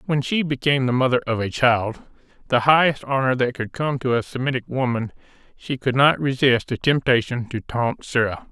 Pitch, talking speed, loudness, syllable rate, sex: 125 Hz, 190 wpm, -21 LUFS, 5.3 syllables/s, male